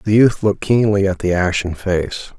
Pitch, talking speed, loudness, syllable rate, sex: 100 Hz, 200 wpm, -17 LUFS, 5.2 syllables/s, male